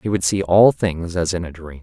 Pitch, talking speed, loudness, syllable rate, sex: 90 Hz, 295 wpm, -18 LUFS, 5.0 syllables/s, male